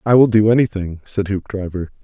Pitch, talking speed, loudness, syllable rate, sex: 100 Hz, 175 wpm, -17 LUFS, 5.5 syllables/s, male